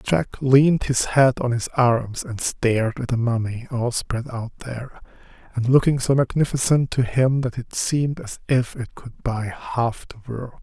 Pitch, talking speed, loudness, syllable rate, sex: 125 Hz, 185 wpm, -21 LUFS, 4.3 syllables/s, male